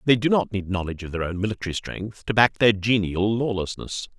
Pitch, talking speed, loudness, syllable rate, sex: 105 Hz, 215 wpm, -23 LUFS, 5.7 syllables/s, male